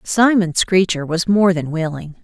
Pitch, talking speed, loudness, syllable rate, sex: 180 Hz, 160 wpm, -17 LUFS, 4.3 syllables/s, female